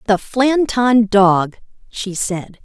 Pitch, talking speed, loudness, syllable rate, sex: 210 Hz, 115 wpm, -16 LUFS, 2.8 syllables/s, female